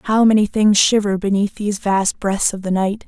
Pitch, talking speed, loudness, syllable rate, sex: 205 Hz, 215 wpm, -17 LUFS, 5.0 syllables/s, female